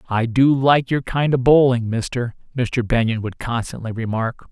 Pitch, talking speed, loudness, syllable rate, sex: 120 Hz, 175 wpm, -19 LUFS, 4.7 syllables/s, male